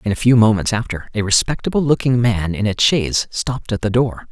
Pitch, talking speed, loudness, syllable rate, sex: 115 Hz, 225 wpm, -17 LUFS, 5.8 syllables/s, male